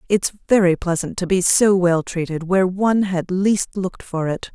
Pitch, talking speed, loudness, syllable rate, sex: 185 Hz, 200 wpm, -19 LUFS, 5.1 syllables/s, female